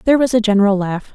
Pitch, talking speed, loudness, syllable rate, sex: 215 Hz, 265 wpm, -15 LUFS, 7.8 syllables/s, female